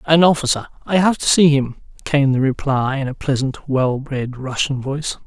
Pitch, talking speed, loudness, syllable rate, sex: 140 Hz, 195 wpm, -18 LUFS, 4.9 syllables/s, male